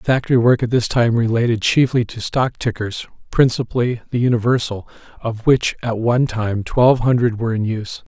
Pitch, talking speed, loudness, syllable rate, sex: 120 Hz, 175 wpm, -18 LUFS, 5.7 syllables/s, male